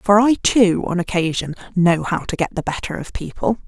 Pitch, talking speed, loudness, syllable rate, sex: 185 Hz, 210 wpm, -19 LUFS, 5.1 syllables/s, female